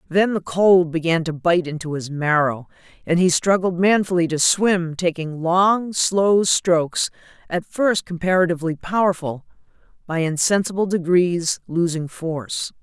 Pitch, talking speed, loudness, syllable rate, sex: 175 Hz, 130 wpm, -20 LUFS, 4.4 syllables/s, female